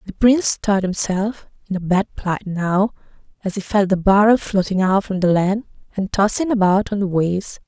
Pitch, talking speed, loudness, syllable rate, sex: 195 Hz, 195 wpm, -18 LUFS, 5.0 syllables/s, female